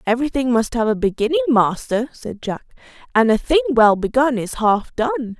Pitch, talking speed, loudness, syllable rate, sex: 240 Hz, 180 wpm, -18 LUFS, 5.2 syllables/s, female